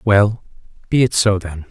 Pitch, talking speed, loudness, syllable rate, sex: 100 Hz, 175 wpm, -17 LUFS, 4.4 syllables/s, male